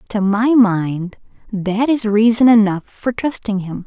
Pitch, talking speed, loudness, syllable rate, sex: 215 Hz, 155 wpm, -16 LUFS, 3.8 syllables/s, female